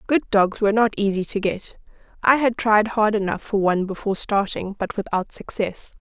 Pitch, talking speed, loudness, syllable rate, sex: 205 Hz, 190 wpm, -21 LUFS, 5.3 syllables/s, female